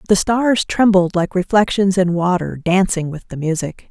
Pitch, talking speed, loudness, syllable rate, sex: 185 Hz, 170 wpm, -17 LUFS, 4.6 syllables/s, female